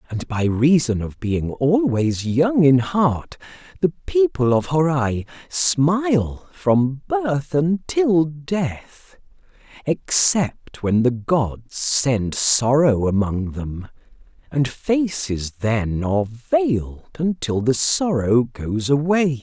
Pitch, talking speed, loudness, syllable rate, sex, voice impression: 140 Hz, 110 wpm, -20 LUFS, 3.0 syllables/s, male, masculine, adult-like, slightly refreshing, slightly sincere